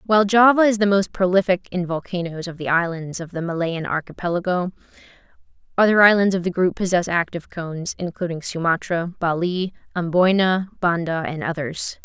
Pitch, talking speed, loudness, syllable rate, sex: 180 Hz, 150 wpm, -20 LUFS, 5.5 syllables/s, female